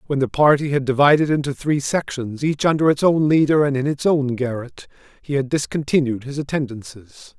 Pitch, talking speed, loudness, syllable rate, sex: 140 Hz, 185 wpm, -19 LUFS, 5.4 syllables/s, male